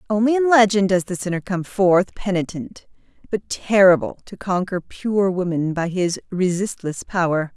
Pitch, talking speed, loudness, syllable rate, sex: 190 Hz, 150 wpm, -20 LUFS, 4.6 syllables/s, female